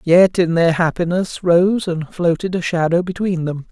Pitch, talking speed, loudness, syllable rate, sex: 175 Hz, 180 wpm, -17 LUFS, 4.4 syllables/s, male